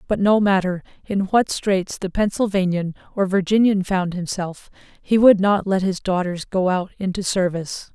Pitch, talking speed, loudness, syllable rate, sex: 190 Hz, 165 wpm, -20 LUFS, 4.7 syllables/s, female